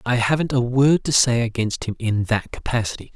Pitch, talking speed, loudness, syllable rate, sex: 120 Hz, 210 wpm, -20 LUFS, 5.3 syllables/s, male